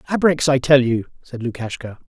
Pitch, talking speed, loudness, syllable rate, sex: 135 Hz, 165 wpm, -18 LUFS, 5.3 syllables/s, male